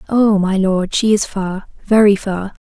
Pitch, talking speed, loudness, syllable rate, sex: 200 Hz, 185 wpm, -15 LUFS, 4.0 syllables/s, female